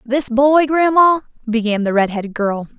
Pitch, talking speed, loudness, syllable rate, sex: 250 Hz, 175 wpm, -15 LUFS, 4.7 syllables/s, female